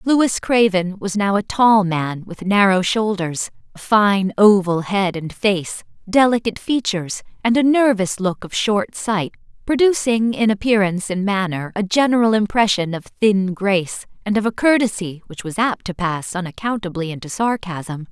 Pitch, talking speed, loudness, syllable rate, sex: 200 Hz, 160 wpm, -18 LUFS, 4.6 syllables/s, female